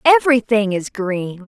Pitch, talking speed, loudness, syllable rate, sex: 225 Hz, 120 wpm, -17 LUFS, 4.6 syllables/s, female